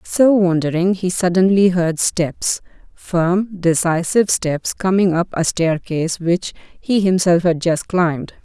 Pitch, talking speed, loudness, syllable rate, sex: 175 Hz, 135 wpm, -17 LUFS, 4.0 syllables/s, female